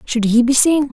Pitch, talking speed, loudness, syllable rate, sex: 255 Hz, 240 wpm, -14 LUFS, 4.8 syllables/s, female